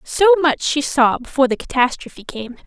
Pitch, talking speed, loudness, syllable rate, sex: 275 Hz, 180 wpm, -16 LUFS, 5.4 syllables/s, female